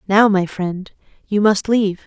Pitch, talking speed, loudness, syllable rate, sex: 200 Hz, 175 wpm, -17 LUFS, 4.4 syllables/s, female